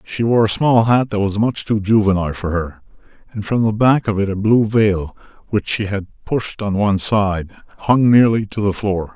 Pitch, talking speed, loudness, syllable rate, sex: 105 Hz, 215 wpm, -17 LUFS, 5.0 syllables/s, male